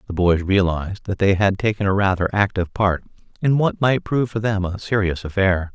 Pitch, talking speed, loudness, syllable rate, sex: 100 Hz, 210 wpm, -20 LUFS, 5.6 syllables/s, male